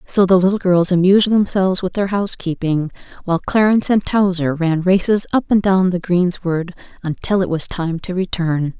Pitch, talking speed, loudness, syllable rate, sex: 180 Hz, 175 wpm, -17 LUFS, 5.3 syllables/s, female